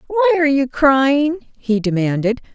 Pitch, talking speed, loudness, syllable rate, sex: 250 Hz, 140 wpm, -16 LUFS, 4.4 syllables/s, female